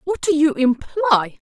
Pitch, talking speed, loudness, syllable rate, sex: 285 Hz, 160 wpm, -18 LUFS, 3.8 syllables/s, female